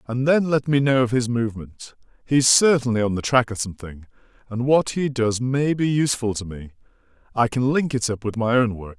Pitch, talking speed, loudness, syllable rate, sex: 120 Hz, 205 wpm, -21 LUFS, 5.5 syllables/s, male